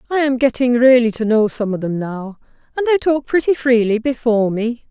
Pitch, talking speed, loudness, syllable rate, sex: 245 Hz, 210 wpm, -16 LUFS, 5.4 syllables/s, female